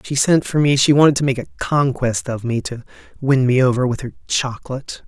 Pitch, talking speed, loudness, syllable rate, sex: 130 Hz, 225 wpm, -18 LUFS, 5.8 syllables/s, male